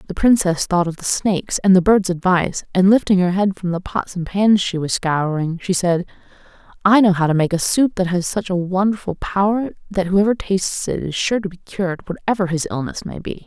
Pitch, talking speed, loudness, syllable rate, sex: 185 Hz, 225 wpm, -18 LUFS, 5.4 syllables/s, female